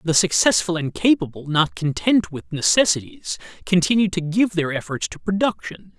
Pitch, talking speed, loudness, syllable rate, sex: 170 Hz, 150 wpm, -20 LUFS, 5.0 syllables/s, male